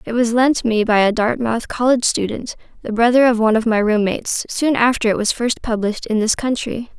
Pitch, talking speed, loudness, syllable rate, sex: 230 Hz, 225 wpm, -17 LUFS, 5.7 syllables/s, female